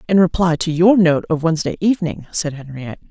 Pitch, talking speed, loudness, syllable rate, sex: 165 Hz, 195 wpm, -17 LUFS, 6.2 syllables/s, female